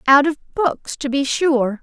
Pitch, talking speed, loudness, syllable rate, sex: 280 Hz, 195 wpm, -19 LUFS, 3.6 syllables/s, female